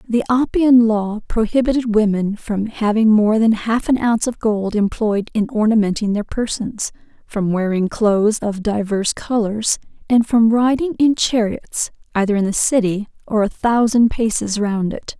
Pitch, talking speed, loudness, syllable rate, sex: 220 Hz, 160 wpm, -17 LUFS, 4.5 syllables/s, female